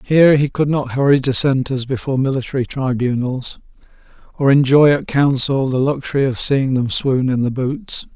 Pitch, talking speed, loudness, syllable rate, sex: 135 Hz, 160 wpm, -16 LUFS, 5.1 syllables/s, male